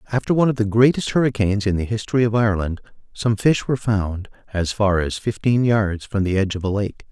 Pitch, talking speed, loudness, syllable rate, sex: 105 Hz, 220 wpm, -20 LUFS, 6.2 syllables/s, male